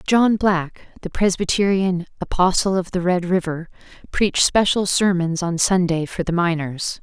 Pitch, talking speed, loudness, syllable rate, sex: 180 Hz, 145 wpm, -19 LUFS, 4.5 syllables/s, female